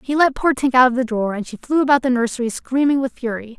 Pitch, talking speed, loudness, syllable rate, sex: 255 Hz, 285 wpm, -18 LUFS, 6.6 syllables/s, female